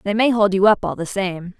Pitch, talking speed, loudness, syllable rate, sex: 200 Hz, 300 wpm, -18 LUFS, 5.6 syllables/s, female